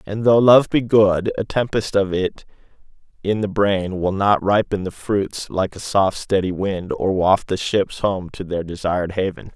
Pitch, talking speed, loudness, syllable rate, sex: 100 Hz, 195 wpm, -19 LUFS, 4.3 syllables/s, male